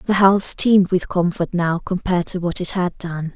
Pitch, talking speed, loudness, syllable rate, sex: 180 Hz, 215 wpm, -19 LUFS, 5.2 syllables/s, female